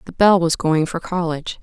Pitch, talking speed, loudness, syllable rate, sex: 170 Hz, 220 wpm, -18 LUFS, 5.4 syllables/s, female